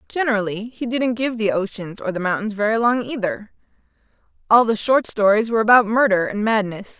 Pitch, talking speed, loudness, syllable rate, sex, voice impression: 220 Hz, 180 wpm, -19 LUFS, 5.6 syllables/s, female, feminine, adult-like, tensed, bright, clear, friendly, slightly reassuring, unique, lively, slightly intense, slightly sharp, slightly light